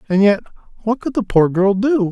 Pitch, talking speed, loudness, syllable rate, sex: 205 Hz, 225 wpm, -17 LUFS, 5.4 syllables/s, male